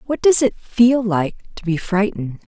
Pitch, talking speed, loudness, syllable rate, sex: 210 Hz, 190 wpm, -18 LUFS, 4.8 syllables/s, female